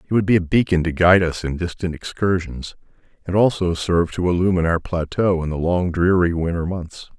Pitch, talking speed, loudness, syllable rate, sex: 90 Hz, 200 wpm, -19 LUFS, 5.7 syllables/s, male